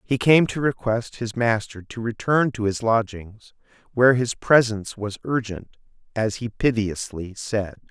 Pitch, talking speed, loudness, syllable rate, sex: 115 Hz, 150 wpm, -22 LUFS, 4.4 syllables/s, male